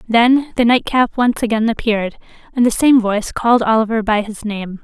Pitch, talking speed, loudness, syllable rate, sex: 225 Hz, 185 wpm, -15 LUFS, 5.5 syllables/s, female